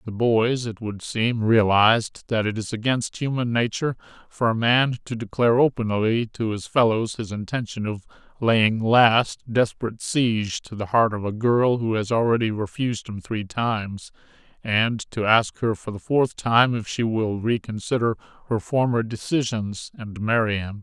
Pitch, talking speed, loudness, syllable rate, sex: 115 Hz, 170 wpm, -22 LUFS, 4.6 syllables/s, male